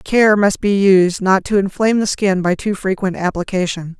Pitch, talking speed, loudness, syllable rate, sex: 195 Hz, 195 wpm, -16 LUFS, 4.8 syllables/s, female